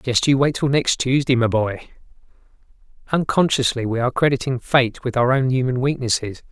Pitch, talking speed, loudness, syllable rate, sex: 130 Hz, 165 wpm, -19 LUFS, 5.4 syllables/s, male